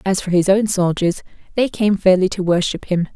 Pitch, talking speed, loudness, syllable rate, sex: 185 Hz, 210 wpm, -17 LUFS, 5.3 syllables/s, female